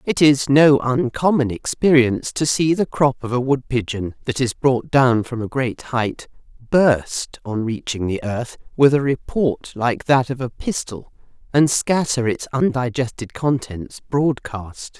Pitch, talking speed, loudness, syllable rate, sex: 130 Hz, 155 wpm, -19 LUFS, 4.0 syllables/s, female